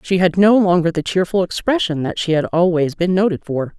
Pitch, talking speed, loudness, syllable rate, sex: 175 Hz, 220 wpm, -17 LUFS, 5.4 syllables/s, female